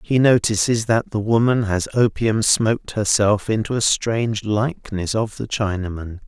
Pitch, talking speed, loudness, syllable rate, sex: 110 Hz, 155 wpm, -19 LUFS, 4.6 syllables/s, male